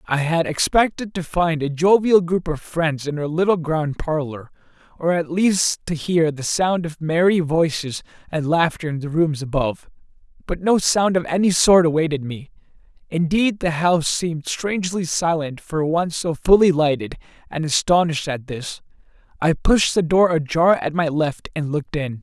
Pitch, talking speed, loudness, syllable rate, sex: 165 Hz, 175 wpm, -20 LUFS, 4.8 syllables/s, male